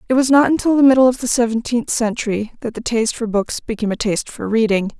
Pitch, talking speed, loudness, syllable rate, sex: 235 Hz, 240 wpm, -17 LUFS, 6.6 syllables/s, female